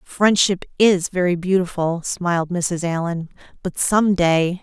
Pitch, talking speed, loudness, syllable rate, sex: 180 Hz, 130 wpm, -19 LUFS, 4.0 syllables/s, female